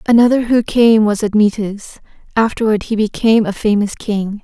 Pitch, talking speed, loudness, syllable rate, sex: 215 Hz, 150 wpm, -14 LUFS, 5.1 syllables/s, female